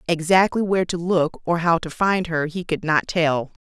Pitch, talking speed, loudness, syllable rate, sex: 170 Hz, 215 wpm, -21 LUFS, 4.8 syllables/s, female